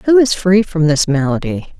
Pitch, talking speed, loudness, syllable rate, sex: 180 Hz, 200 wpm, -14 LUFS, 4.9 syllables/s, female